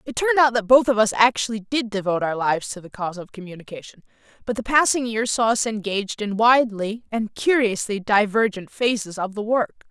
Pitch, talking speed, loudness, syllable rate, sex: 220 Hz, 200 wpm, -21 LUFS, 5.8 syllables/s, female